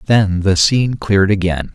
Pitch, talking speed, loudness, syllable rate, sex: 100 Hz, 170 wpm, -14 LUFS, 5.1 syllables/s, male